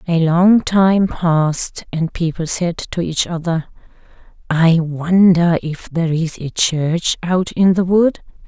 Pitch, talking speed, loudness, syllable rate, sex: 170 Hz, 140 wpm, -16 LUFS, 3.7 syllables/s, female